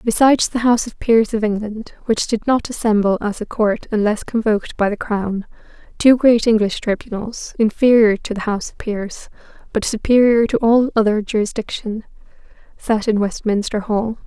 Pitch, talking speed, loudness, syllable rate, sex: 220 Hz, 165 wpm, -17 LUFS, 5.1 syllables/s, female